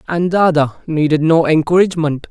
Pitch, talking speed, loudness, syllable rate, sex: 160 Hz, 130 wpm, -14 LUFS, 5.6 syllables/s, male